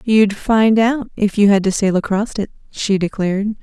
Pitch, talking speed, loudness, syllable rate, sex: 205 Hz, 200 wpm, -16 LUFS, 4.8 syllables/s, female